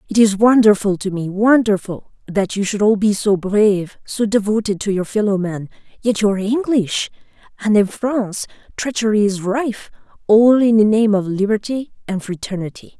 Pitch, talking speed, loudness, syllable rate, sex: 210 Hz, 150 wpm, -17 LUFS, 5.1 syllables/s, female